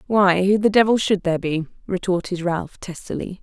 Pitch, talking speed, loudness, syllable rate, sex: 185 Hz, 175 wpm, -20 LUFS, 5.2 syllables/s, female